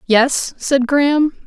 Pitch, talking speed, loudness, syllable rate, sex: 270 Hz, 125 wpm, -16 LUFS, 3.2 syllables/s, female